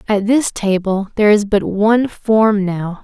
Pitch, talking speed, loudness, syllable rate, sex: 205 Hz, 180 wpm, -15 LUFS, 4.3 syllables/s, female